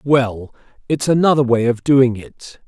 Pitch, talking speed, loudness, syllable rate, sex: 125 Hz, 155 wpm, -16 LUFS, 4.1 syllables/s, male